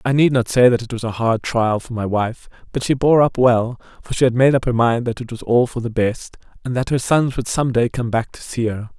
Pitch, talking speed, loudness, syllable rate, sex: 120 Hz, 295 wpm, -18 LUFS, 5.4 syllables/s, male